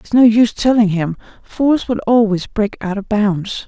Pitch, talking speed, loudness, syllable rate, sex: 215 Hz, 195 wpm, -15 LUFS, 4.6 syllables/s, female